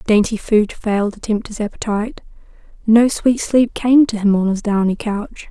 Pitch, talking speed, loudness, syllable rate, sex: 215 Hz, 185 wpm, -17 LUFS, 4.8 syllables/s, female